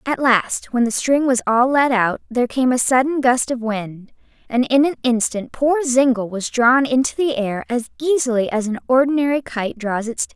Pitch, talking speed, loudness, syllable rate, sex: 250 Hz, 210 wpm, -18 LUFS, 5.0 syllables/s, female